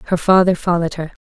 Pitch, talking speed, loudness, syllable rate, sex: 175 Hz, 195 wpm, -16 LUFS, 7.6 syllables/s, female